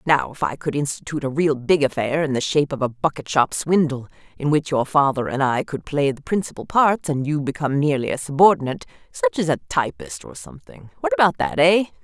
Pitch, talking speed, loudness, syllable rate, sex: 140 Hz, 210 wpm, -20 LUFS, 6.1 syllables/s, female